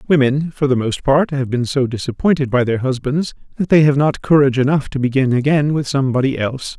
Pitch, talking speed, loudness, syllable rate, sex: 135 Hz, 210 wpm, -16 LUFS, 6.0 syllables/s, male